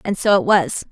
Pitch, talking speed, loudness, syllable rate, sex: 200 Hz, 260 wpm, -16 LUFS, 5.3 syllables/s, female